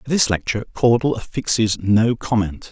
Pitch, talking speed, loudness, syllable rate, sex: 110 Hz, 155 wpm, -19 LUFS, 5.3 syllables/s, male